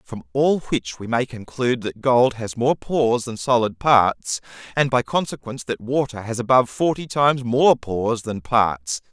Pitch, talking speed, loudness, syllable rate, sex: 120 Hz, 180 wpm, -21 LUFS, 4.7 syllables/s, male